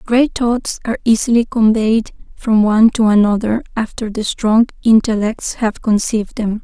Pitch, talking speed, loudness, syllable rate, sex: 220 Hz, 145 wpm, -15 LUFS, 4.8 syllables/s, female